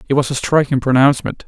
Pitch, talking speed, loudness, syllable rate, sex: 135 Hz, 205 wpm, -15 LUFS, 7.0 syllables/s, male